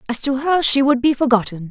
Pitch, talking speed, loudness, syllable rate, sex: 260 Hz, 245 wpm, -16 LUFS, 6.0 syllables/s, female